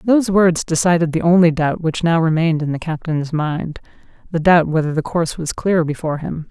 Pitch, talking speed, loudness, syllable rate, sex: 165 Hz, 195 wpm, -17 LUFS, 5.6 syllables/s, female